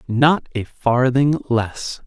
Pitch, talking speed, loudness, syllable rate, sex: 125 Hz, 115 wpm, -19 LUFS, 2.8 syllables/s, male